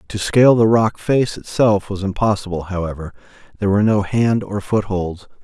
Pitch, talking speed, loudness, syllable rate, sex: 100 Hz, 175 wpm, -18 LUFS, 5.4 syllables/s, male